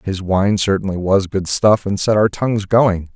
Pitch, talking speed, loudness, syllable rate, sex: 100 Hz, 210 wpm, -16 LUFS, 4.7 syllables/s, male